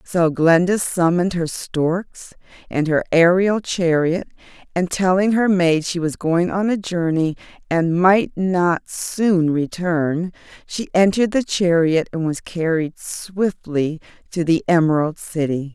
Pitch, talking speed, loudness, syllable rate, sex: 175 Hz, 135 wpm, -19 LUFS, 3.8 syllables/s, female